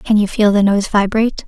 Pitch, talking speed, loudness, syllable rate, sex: 210 Hz, 245 wpm, -14 LUFS, 5.6 syllables/s, female